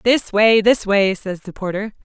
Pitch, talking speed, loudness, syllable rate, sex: 205 Hz, 205 wpm, -17 LUFS, 4.3 syllables/s, female